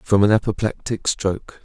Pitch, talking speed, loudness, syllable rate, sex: 105 Hz, 145 wpm, -20 LUFS, 5.0 syllables/s, male